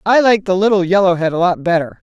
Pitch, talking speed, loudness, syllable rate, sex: 190 Hz, 225 wpm, -14 LUFS, 6.2 syllables/s, female